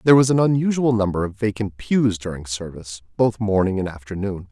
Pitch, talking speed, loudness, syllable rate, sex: 105 Hz, 185 wpm, -21 LUFS, 5.9 syllables/s, male